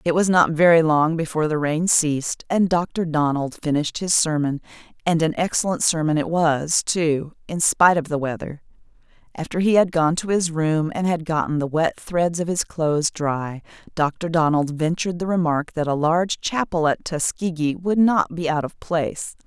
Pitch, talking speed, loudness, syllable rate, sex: 160 Hz, 190 wpm, -21 LUFS, 4.9 syllables/s, female